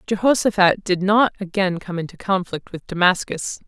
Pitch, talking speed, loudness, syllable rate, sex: 190 Hz, 145 wpm, -20 LUFS, 5.0 syllables/s, female